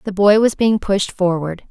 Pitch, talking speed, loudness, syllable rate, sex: 195 Hz, 210 wpm, -16 LUFS, 4.4 syllables/s, female